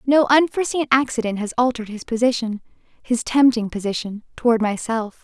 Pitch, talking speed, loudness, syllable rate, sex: 240 Hz, 115 wpm, -20 LUFS, 5.8 syllables/s, female